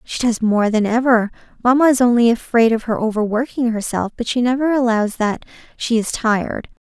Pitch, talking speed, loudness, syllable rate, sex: 235 Hz, 185 wpm, -17 LUFS, 5.4 syllables/s, female